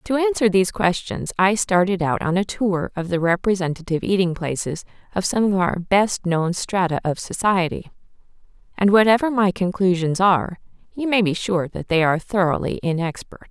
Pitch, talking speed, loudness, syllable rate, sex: 190 Hz, 170 wpm, -20 LUFS, 5.3 syllables/s, female